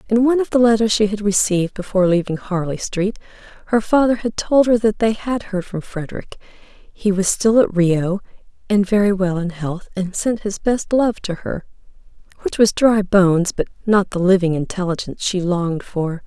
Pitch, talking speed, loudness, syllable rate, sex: 200 Hz, 190 wpm, -18 LUFS, 5.1 syllables/s, female